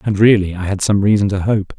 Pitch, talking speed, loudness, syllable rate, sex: 100 Hz, 270 wpm, -15 LUFS, 5.9 syllables/s, male